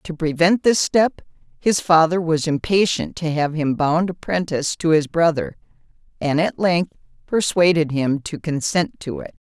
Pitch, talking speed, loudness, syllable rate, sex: 165 Hz, 160 wpm, -19 LUFS, 4.6 syllables/s, female